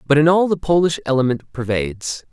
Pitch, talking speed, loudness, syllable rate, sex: 145 Hz, 180 wpm, -18 LUFS, 5.7 syllables/s, male